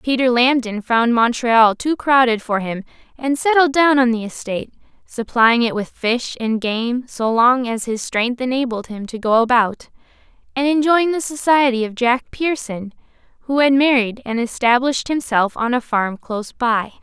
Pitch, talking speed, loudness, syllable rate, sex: 245 Hz, 170 wpm, -17 LUFS, 4.6 syllables/s, female